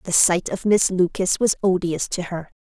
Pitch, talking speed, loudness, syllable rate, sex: 180 Hz, 205 wpm, -20 LUFS, 4.7 syllables/s, female